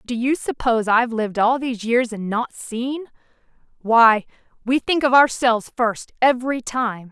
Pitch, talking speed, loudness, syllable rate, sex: 240 Hz, 150 wpm, -19 LUFS, 4.8 syllables/s, female